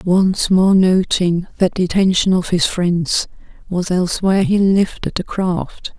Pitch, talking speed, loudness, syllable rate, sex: 180 Hz, 150 wpm, -16 LUFS, 4.1 syllables/s, female